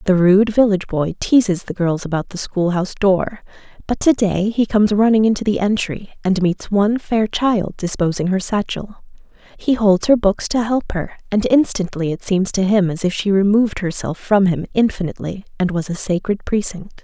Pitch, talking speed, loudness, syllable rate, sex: 200 Hz, 190 wpm, -18 LUFS, 5.2 syllables/s, female